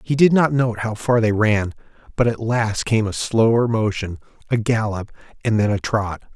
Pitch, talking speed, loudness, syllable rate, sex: 110 Hz, 200 wpm, -20 LUFS, 4.7 syllables/s, male